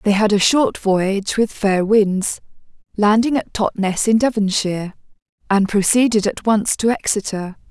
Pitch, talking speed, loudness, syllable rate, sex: 210 Hz, 150 wpm, -17 LUFS, 4.5 syllables/s, female